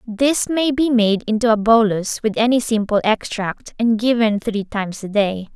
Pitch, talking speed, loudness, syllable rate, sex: 220 Hz, 185 wpm, -18 LUFS, 4.6 syllables/s, female